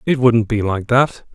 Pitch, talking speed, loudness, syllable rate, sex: 115 Hz, 225 wpm, -16 LUFS, 4.3 syllables/s, male